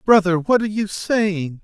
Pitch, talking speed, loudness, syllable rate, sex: 195 Hz, 185 wpm, -19 LUFS, 4.6 syllables/s, male